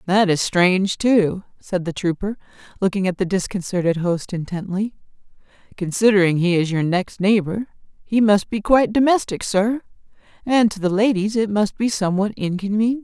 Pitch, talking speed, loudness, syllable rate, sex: 200 Hz, 155 wpm, -19 LUFS, 5.2 syllables/s, female